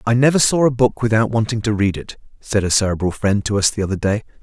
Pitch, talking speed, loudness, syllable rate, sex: 110 Hz, 260 wpm, -17 LUFS, 6.4 syllables/s, male